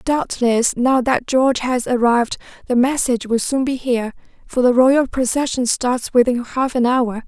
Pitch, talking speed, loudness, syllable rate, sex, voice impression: 250 Hz, 175 wpm, -17 LUFS, 4.8 syllables/s, female, feminine, adult-like, powerful, slightly weak, slightly halting, raspy, calm, friendly, reassuring, elegant, slightly lively, slightly modest